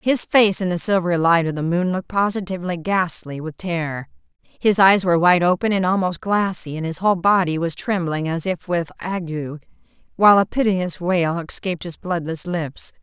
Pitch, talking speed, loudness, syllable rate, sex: 175 Hz, 185 wpm, -19 LUFS, 5.2 syllables/s, female